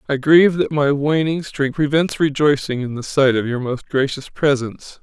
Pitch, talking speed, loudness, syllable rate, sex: 140 Hz, 190 wpm, -18 LUFS, 5.0 syllables/s, male